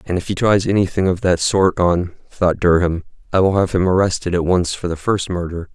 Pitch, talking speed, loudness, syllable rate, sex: 90 Hz, 220 wpm, -17 LUFS, 5.2 syllables/s, male